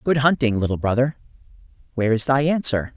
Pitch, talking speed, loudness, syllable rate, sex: 125 Hz, 160 wpm, -20 LUFS, 6.3 syllables/s, male